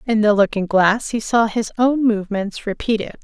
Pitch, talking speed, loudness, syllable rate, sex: 220 Hz, 185 wpm, -18 LUFS, 4.9 syllables/s, female